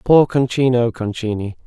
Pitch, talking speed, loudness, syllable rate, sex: 120 Hz, 110 wpm, -18 LUFS, 4.7 syllables/s, male